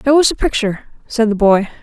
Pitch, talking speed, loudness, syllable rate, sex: 235 Hz, 230 wpm, -15 LUFS, 6.4 syllables/s, female